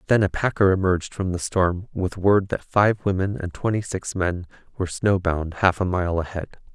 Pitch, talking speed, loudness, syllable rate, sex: 95 Hz, 195 wpm, -23 LUFS, 5.0 syllables/s, male